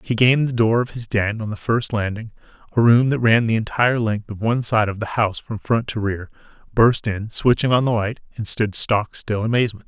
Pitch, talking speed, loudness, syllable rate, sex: 110 Hz, 235 wpm, -20 LUFS, 5.8 syllables/s, male